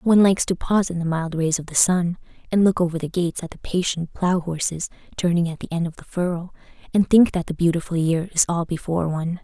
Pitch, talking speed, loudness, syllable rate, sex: 175 Hz, 240 wpm, -22 LUFS, 6.2 syllables/s, female